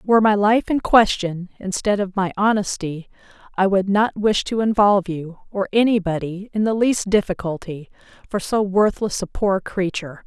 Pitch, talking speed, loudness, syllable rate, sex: 200 Hz, 170 wpm, -20 LUFS, 4.9 syllables/s, female